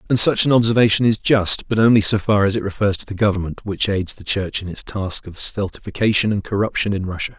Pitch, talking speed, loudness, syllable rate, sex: 100 Hz, 235 wpm, -18 LUFS, 6.0 syllables/s, male